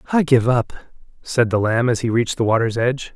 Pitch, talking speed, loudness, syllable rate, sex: 120 Hz, 230 wpm, -18 LUFS, 5.8 syllables/s, male